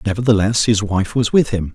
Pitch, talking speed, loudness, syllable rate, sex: 105 Hz, 205 wpm, -16 LUFS, 5.5 syllables/s, male